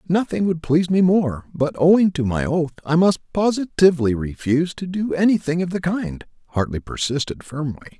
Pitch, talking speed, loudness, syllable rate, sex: 160 Hz, 175 wpm, -20 LUFS, 5.4 syllables/s, male